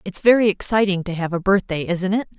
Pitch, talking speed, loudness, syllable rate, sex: 190 Hz, 225 wpm, -19 LUFS, 5.9 syllables/s, female